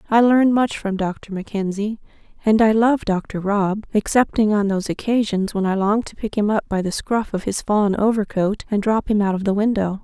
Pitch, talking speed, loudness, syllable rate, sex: 210 Hz, 215 wpm, -20 LUFS, 5.0 syllables/s, female